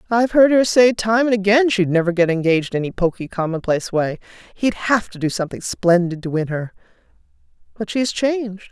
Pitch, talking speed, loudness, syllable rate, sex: 200 Hz, 195 wpm, -18 LUFS, 5.9 syllables/s, female